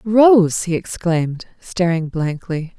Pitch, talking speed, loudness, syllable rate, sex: 175 Hz, 110 wpm, -17 LUFS, 3.5 syllables/s, female